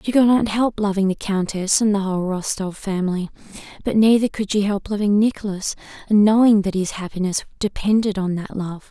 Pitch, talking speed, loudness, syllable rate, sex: 200 Hz, 190 wpm, -20 LUFS, 5.5 syllables/s, female